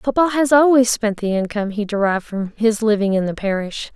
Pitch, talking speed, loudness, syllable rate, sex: 220 Hz, 215 wpm, -18 LUFS, 5.6 syllables/s, female